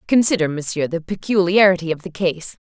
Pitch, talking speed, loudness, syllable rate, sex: 180 Hz, 155 wpm, -18 LUFS, 5.7 syllables/s, female